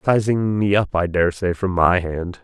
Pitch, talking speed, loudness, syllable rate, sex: 95 Hz, 200 wpm, -19 LUFS, 4.8 syllables/s, male